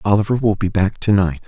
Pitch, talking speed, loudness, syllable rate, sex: 100 Hz, 245 wpm, -17 LUFS, 6.0 syllables/s, male